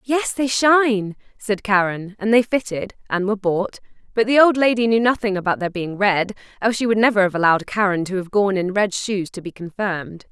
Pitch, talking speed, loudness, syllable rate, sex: 205 Hz, 215 wpm, -19 LUFS, 5.5 syllables/s, female